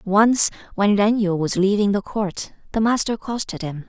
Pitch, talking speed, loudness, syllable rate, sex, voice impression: 205 Hz, 185 wpm, -20 LUFS, 4.8 syllables/s, female, very feminine, slightly young, very adult-like, slightly thin, relaxed, weak, bright, hard, slightly muffled, fluent, raspy, very cute, slightly cool, very intellectual, refreshing, sincere, very calm, friendly, very reassuring, very unique, elegant, wild, sweet, slightly lively, strict, slightly intense, modest, light